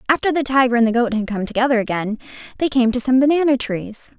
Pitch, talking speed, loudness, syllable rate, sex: 250 Hz, 230 wpm, -18 LUFS, 6.7 syllables/s, female